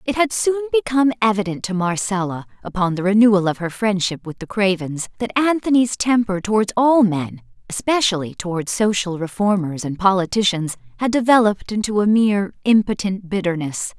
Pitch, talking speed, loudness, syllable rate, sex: 205 Hz, 150 wpm, -19 LUFS, 5.5 syllables/s, female